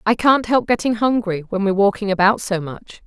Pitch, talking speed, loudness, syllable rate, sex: 205 Hz, 215 wpm, -18 LUFS, 5.6 syllables/s, female